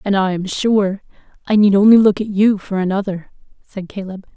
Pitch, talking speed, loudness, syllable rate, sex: 200 Hz, 180 wpm, -15 LUFS, 5.0 syllables/s, female